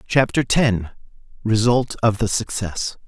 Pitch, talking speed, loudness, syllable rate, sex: 115 Hz, 100 wpm, -20 LUFS, 3.9 syllables/s, male